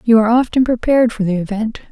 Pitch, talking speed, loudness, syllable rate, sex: 225 Hz, 220 wpm, -15 LUFS, 7.0 syllables/s, female